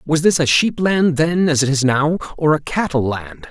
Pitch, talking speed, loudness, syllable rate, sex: 150 Hz, 240 wpm, -17 LUFS, 4.7 syllables/s, male